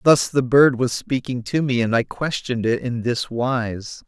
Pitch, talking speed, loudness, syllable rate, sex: 125 Hz, 205 wpm, -20 LUFS, 4.3 syllables/s, male